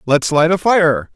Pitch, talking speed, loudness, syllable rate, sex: 160 Hz, 205 wpm, -14 LUFS, 4.0 syllables/s, male